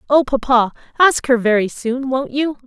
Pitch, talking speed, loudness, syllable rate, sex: 260 Hz, 180 wpm, -17 LUFS, 4.7 syllables/s, female